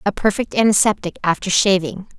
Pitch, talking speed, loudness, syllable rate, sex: 200 Hz, 140 wpm, -17 LUFS, 5.5 syllables/s, female